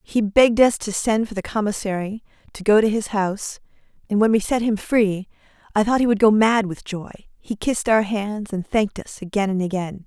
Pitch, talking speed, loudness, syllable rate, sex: 210 Hz, 220 wpm, -20 LUFS, 5.5 syllables/s, female